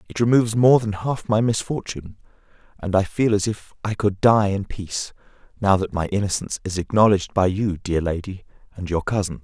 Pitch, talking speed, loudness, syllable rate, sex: 100 Hz, 190 wpm, -21 LUFS, 5.7 syllables/s, male